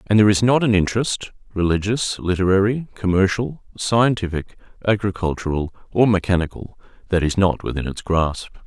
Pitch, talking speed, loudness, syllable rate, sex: 100 Hz, 120 wpm, -20 LUFS, 5.4 syllables/s, male